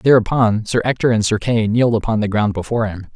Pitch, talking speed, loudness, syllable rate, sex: 110 Hz, 230 wpm, -17 LUFS, 6.3 syllables/s, male